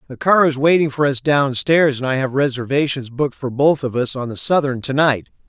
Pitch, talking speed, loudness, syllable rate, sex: 135 Hz, 230 wpm, -17 LUFS, 5.4 syllables/s, male